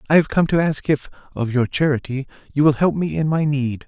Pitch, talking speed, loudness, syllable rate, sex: 140 Hz, 250 wpm, -20 LUFS, 5.6 syllables/s, male